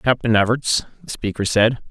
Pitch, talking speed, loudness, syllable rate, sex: 115 Hz, 160 wpm, -19 LUFS, 5.0 syllables/s, male